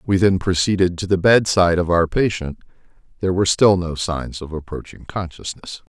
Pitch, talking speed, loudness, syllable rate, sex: 90 Hz, 170 wpm, -19 LUFS, 5.5 syllables/s, male